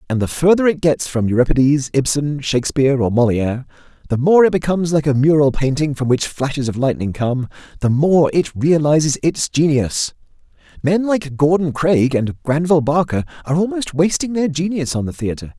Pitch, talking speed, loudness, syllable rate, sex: 145 Hz, 170 wpm, -17 LUFS, 5.4 syllables/s, male